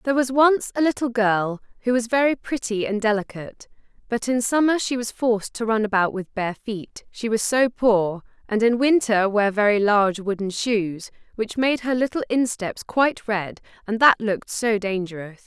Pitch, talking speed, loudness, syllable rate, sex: 220 Hz, 185 wpm, -22 LUFS, 5.0 syllables/s, female